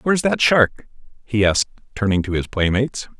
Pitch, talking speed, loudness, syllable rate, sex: 115 Hz, 170 wpm, -19 LUFS, 5.9 syllables/s, male